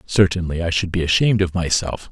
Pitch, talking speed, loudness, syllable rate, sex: 90 Hz, 200 wpm, -19 LUFS, 6.1 syllables/s, male